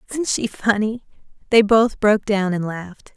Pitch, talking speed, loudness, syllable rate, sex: 210 Hz, 170 wpm, -19 LUFS, 4.8 syllables/s, female